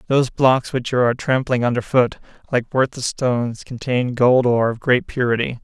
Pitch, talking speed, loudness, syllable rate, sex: 125 Hz, 180 wpm, -19 LUFS, 5.3 syllables/s, male